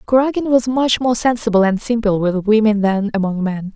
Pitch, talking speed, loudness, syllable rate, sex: 220 Hz, 190 wpm, -16 LUFS, 5.4 syllables/s, female